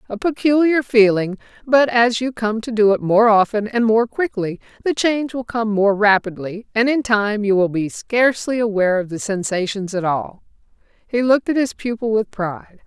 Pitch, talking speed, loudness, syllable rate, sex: 220 Hz, 190 wpm, -18 LUFS, 5.1 syllables/s, female